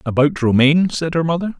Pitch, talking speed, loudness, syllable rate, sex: 155 Hz, 190 wpm, -16 LUFS, 6.2 syllables/s, male